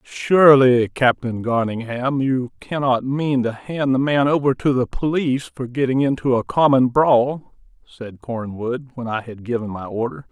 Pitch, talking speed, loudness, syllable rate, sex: 130 Hz, 165 wpm, -19 LUFS, 4.6 syllables/s, male